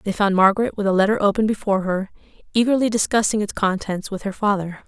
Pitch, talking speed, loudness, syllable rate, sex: 205 Hz, 195 wpm, -20 LUFS, 6.4 syllables/s, female